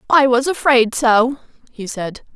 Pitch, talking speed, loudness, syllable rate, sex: 245 Hz, 155 wpm, -15 LUFS, 4.1 syllables/s, female